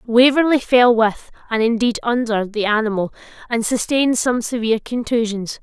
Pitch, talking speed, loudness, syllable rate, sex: 230 Hz, 140 wpm, -18 LUFS, 5.1 syllables/s, female